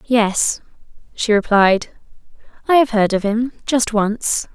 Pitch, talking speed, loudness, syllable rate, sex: 225 Hz, 120 wpm, -17 LUFS, 3.6 syllables/s, female